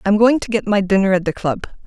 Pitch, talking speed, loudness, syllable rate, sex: 200 Hz, 290 wpm, -17 LUFS, 6.3 syllables/s, female